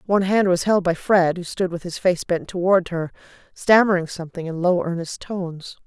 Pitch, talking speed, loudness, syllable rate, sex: 180 Hz, 205 wpm, -21 LUFS, 5.4 syllables/s, female